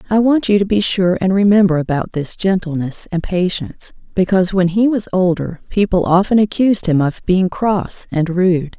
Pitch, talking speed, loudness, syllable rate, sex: 185 Hz, 185 wpm, -16 LUFS, 5.0 syllables/s, female